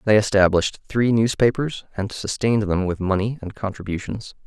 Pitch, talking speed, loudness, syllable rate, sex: 105 Hz, 150 wpm, -21 LUFS, 5.4 syllables/s, male